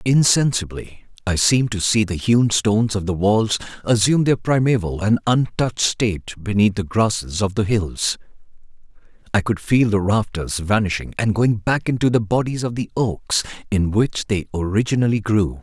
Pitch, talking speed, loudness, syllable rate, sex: 105 Hz, 165 wpm, -19 LUFS, 4.9 syllables/s, male